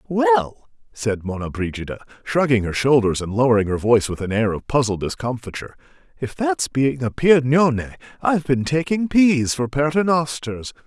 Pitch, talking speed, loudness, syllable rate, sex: 125 Hz, 155 wpm, -20 LUFS, 5.4 syllables/s, male